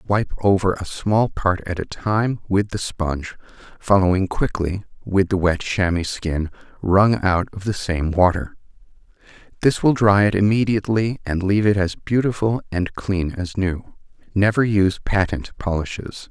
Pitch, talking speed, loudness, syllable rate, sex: 100 Hz, 155 wpm, -20 LUFS, 4.6 syllables/s, male